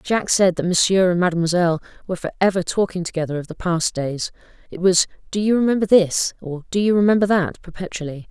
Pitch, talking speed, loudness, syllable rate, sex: 180 Hz, 190 wpm, -19 LUFS, 6.3 syllables/s, female